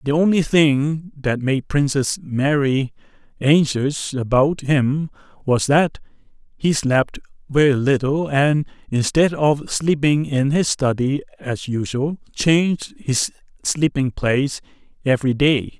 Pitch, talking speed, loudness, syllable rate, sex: 140 Hz, 120 wpm, -19 LUFS, 3.8 syllables/s, male